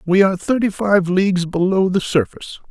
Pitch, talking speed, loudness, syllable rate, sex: 190 Hz, 180 wpm, -17 LUFS, 5.6 syllables/s, male